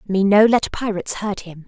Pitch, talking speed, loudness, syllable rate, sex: 200 Hz, 215 wpm, -18 LUFS, 5.2 syllables/s, female